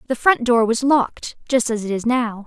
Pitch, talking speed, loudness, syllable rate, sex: 235 Hz, 245 wpm, -19 LUFS, 5.1 syllables/s, female